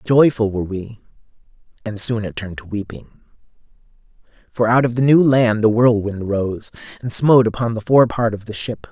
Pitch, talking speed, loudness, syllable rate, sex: 115 Hz, 180 wpm, -17 LUFS, 5.3 syllables/s, male